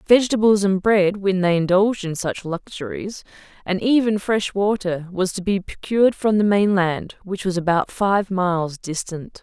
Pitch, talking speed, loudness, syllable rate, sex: 195 Hz, 165 wpm, -20 LUFS, 4.7 syllables/s, female